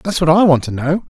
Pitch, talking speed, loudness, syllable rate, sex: 165 Hz, 300 wpm, -14 LUFS, 5.7 syllables/s, male